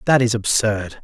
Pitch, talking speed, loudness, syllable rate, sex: 115 Hz, 175 wpm, -18 LUFS, 4.7 syllables/s, male